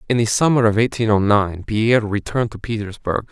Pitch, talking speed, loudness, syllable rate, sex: 110 Hz, 200 wpm, -18 LUFS, 5.8 syllables/s, male